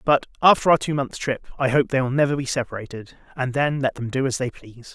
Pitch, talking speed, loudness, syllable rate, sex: 130 Hz, 255 wpm, -22 LUFS, 6.2 syllables/s, male